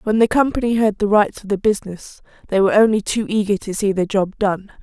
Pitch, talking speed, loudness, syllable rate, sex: 205 Hz, 235 wpm, -18 LUFS, 6.0 syllables/s, female